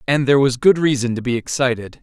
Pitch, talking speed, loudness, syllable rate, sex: 130 Hz, 235 wpm, -17 LUFS, 6.4 syllables/s, male